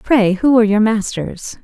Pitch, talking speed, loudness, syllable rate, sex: 215 Hz, 185 wpm, -14 LUFS, 4.7 syllables/s, female